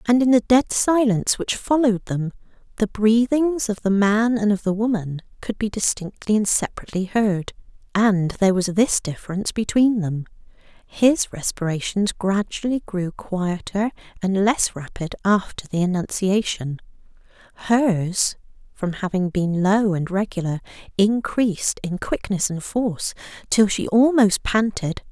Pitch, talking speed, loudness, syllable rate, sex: 205 Hz, 135 wpm, -21 LUFS, 4.5 syllables/s, female